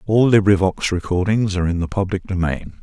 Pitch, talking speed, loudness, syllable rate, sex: 95 Hz, 170 wpm, -18 LUFS, 5.6 syllables/s, male